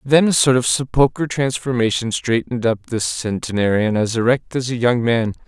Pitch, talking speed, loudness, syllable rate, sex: 120 Hz, 175 wpm, -18 LUFS, 5.1 syllables/s, male